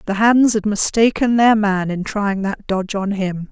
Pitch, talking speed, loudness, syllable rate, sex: 205 Hz, 205 wpm, -17 LUFS, 4.5 syllables/s, female